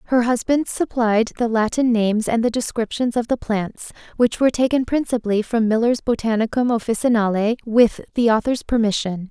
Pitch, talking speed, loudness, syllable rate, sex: 230 Hz, 155 wpm, -19 LUFS, 5.4 syllables/s, female